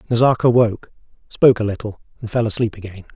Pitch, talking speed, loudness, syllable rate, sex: 110 Hz, 170 wpm, -18 LUFS, 7.4 syllables/s, male